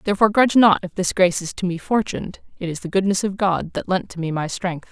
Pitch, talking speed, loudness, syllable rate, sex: 185 Hz, 270 wpm, -20 LUFS, 6.5 syllables/s, female